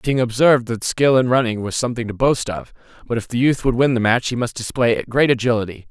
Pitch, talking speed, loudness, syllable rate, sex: 120 Hz, 255 wpm, -18 LUFS, 6.2 syllables/s, male